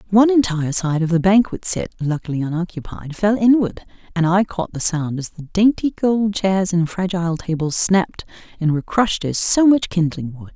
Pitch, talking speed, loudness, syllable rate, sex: 185 Hz, 190 wpm, -18 LUFS, 5.3 syllables/s, female